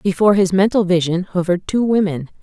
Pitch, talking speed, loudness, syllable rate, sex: 185 Hz, 175 wpm, -16 LUFS, 6.1 syllables/s, female